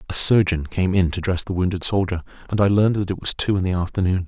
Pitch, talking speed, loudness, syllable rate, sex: 95 Hz, 265 wpm, -20 LUFS, 6.5 syllables/s, male